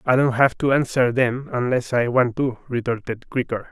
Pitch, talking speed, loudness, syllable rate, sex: 125 Hz, 195 wpm, -21 LUFS, 4.9 syllables/s, male